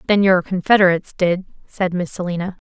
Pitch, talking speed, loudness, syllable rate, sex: 185 Hz, 155 wpm, -18 LUFS, 5.8 syllables/s, female